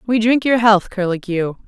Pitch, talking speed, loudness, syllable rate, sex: 210 Hz, 180 wpm, -16 LUFS, 4.6 syllables/s, female